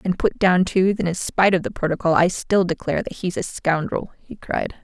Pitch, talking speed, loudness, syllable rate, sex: 180 Hz, 235 wpm, -21 LUFS, 5.4 syllables/s, female